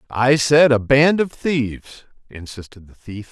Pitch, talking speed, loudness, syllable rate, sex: 125 Hz, 165 wpm, -16 LUFS, 4.2 syllables/s, male